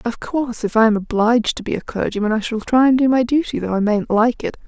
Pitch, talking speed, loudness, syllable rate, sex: 230 Hz, 285 wpm, -18 LUFS, 6.2 syllables/s, female